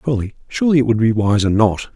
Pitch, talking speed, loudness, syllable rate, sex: 115 Hz, 185 wpm, -16 LUFS, 6.9 syllables/s, male